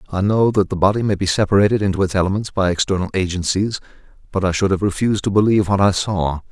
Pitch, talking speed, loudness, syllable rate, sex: 95 Hz, 220 wpm, -18 LUFS, 6.8 syllables/s, male